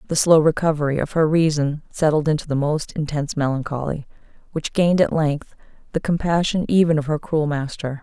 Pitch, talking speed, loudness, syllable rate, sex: 155 Hz, 170 wpm, -20 LUFS, 5.7 syllables/s, female